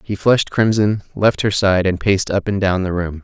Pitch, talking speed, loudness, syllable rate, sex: 95 Hz, 240 wpm, -17 LUFS, 5.3 syllables/s, male